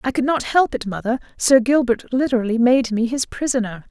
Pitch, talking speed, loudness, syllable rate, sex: 245 Hz, 200 wpm, -19 LUFS, 5.6 syllables/s, female